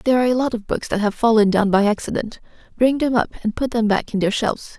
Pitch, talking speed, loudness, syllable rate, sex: 225 Hz, 275 wpm, -19 LUFS, 6.6 syllables/s, female